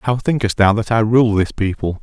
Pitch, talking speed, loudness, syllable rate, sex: 110 Hz, 240 wpm, -16 LUFS, 5.3 syllables/s, male